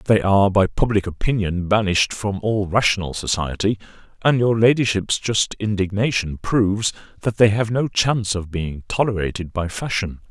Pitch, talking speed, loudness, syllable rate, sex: 100 Hz, 150 wpm, -20 LUFS, 5.0 syllables/s, male